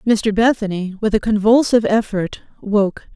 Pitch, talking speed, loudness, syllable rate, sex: 210 Hz, 135 wpm, -17 LUFS, 4.8 syllables/s, female